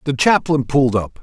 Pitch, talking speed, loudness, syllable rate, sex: 135 Hz, 195 wpm, -16 LUFS, 5.4 syllables/s, male